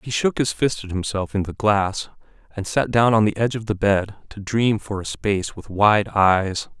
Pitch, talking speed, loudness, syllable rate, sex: 105 Hz, 230 wpm, -21 LUFS, 4.8 syllables/s, male